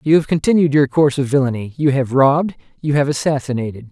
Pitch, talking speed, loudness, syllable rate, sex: 140 Hz, 185 wpm, -16 LUFS, 6.5 syllables/s, male